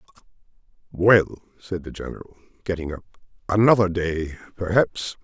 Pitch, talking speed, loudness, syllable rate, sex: 95 Hz, 115 wpm, -22 LUFS, 5.9 syllables/s, male